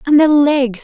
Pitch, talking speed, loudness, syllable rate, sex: 275 Hz, 215 wpm, -12 LUFS, 4.3 syllables/s, female